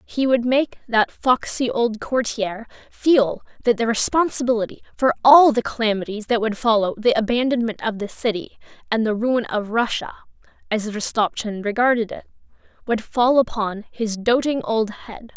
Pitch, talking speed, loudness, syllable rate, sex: 230 Hz, 150 wpm, -20 LUFS, 4.4 syllables/s, female